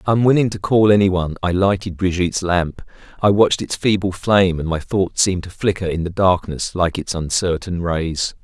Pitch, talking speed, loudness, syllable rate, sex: 95 Hz, 190 wpm, -18 LUFS, 5.4 syllables/s, male